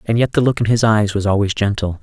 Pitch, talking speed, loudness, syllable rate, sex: 105 Hz, 295 wpm, -16 LUFS, 6.2 syllables/s, male